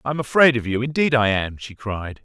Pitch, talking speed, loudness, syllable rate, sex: 120 Hz, 240 wpm, -20 LUFS, 5.6 syllables/s, male